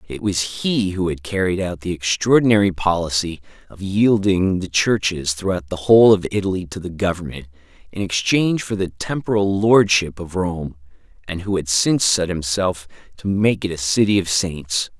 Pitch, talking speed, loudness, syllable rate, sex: 95 Hz, 170 wpm, -19 LUFS, 5.0 syllables/s, male